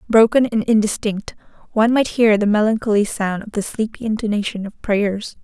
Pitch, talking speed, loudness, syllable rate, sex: 215 Hz, 165 wpm, -18 LUFS, 5.4 syllables/s, female